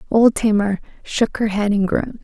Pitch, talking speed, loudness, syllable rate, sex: 210 Hz, 190 wpm, -18 LUFS, 5.0 syllables/s, female